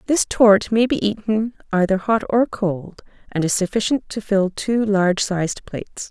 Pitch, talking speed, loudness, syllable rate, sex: 205 Hz, 175 wpm, -19 LUFS, 4.7 syllables/s, female